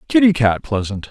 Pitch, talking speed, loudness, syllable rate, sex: 140 Hz, 160 wpm, -17 LUFS, 5.3 syllables/s, male